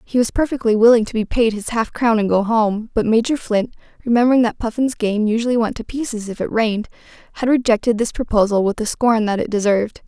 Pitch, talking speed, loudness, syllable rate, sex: 225 Hz, 220 wpm, -18 LUFS, 6.1 syllables/s, female